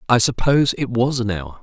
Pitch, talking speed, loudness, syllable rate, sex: 120 Hz, 220 wpm, -19 LUFS, 5.5 syllables/s, male